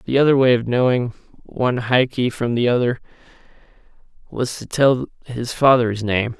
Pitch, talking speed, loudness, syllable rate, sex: 125 Hz, 150 wpm, -19 LUFS, 4.9 syllables/s, male